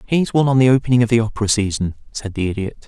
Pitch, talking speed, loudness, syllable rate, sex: 115 Hz, 250 wpm, -17 LUFS, 7.8 syllables/s, male